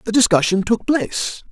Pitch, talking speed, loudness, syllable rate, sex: 215 Hz, 160 wpm, -17 LUFS, 5.2 syllables/s, male